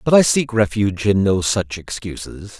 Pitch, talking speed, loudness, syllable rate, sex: 105 Hz, 185 wpm, -18 LUFS, 4.9 syllables/s, male